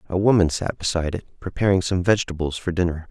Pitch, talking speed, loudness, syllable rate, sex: 90 Hz, 195 wpm, -22 LUFS, 6.5 syllables/s, male